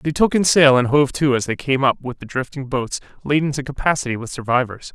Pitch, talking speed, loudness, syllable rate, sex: 135 Hz, 245 wpm, -19 LUFS, 5.8 syllables/s, male